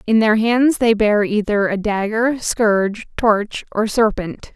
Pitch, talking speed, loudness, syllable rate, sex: 215 Hz, 160 wpm, -17 LUFS, 3.8 syllables/s, female